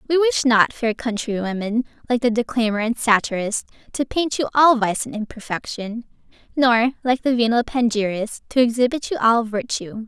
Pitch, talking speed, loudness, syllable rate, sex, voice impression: 235 Hz, 160 wpm, -20 LUFS, 5.2 syllables/s, female, feminine, slightly young, tensed, powerful, bright, clear, fluent, slightly intellectual, friendly, elegant, lively, slightly sharp